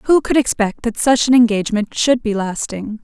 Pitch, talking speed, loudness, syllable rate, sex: 230 Hz, 200 wpm, -16 LUFS, 5.0 syllables/s, female